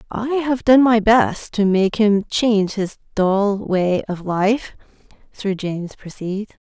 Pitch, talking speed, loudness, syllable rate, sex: 210 Hz, 155 wpm, -18 LUFS, 3.6 syllables/s, female